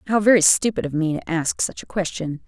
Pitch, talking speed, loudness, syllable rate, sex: 180 Hz, 240 wpm, -20 LUFS, 5.7 syllables/s, female